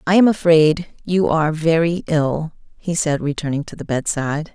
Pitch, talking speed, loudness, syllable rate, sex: 160 Hz, 170 wpm, -18 LUFS, 4.8 syllables/s, female